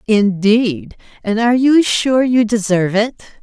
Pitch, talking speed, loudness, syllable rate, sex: 220 Hz, 140 wpm, -14 LUFS, 4.3 syllables/s, female